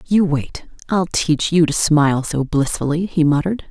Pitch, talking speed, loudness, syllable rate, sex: 160 Hz, 180 wpm, -17 LUFS, 4.9 syllables/s, female